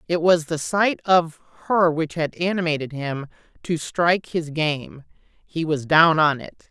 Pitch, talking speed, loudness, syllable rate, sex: 160 Hz, 170 wpm, -21 LUFS, 4.1 syllables/s, female